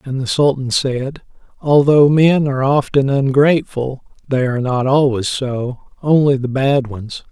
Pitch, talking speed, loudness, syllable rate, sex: 135 Hz, 150 wpm, -15 LUFS, 4.4 syllables/s, male